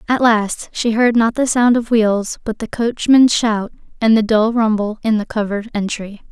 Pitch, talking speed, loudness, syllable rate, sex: 225 Hz, 200 wpm, -16 LUFS, 4.6 syllables/s, female